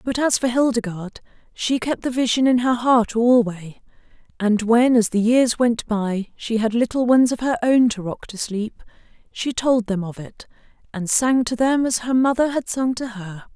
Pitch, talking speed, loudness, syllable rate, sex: 235 Hz, 205 wpm, -20 LUFS, 4.7 syllables/s, female